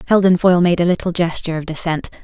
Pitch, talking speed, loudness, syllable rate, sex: 175 Hz, 215 wpm, -16 LUFS, 7.2 syllables/s, female